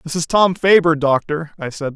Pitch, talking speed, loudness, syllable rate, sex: 160 Hz, 215 wpm, -16 LUFS, 4.9 syllables/s, male